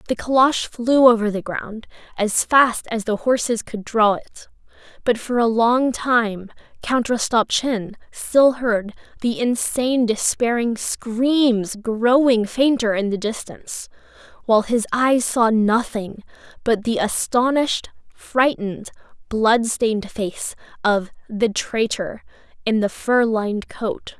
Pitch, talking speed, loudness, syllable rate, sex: 230 Hz, 125 wpm, -20 LUFS, 3.8 syllables/s, female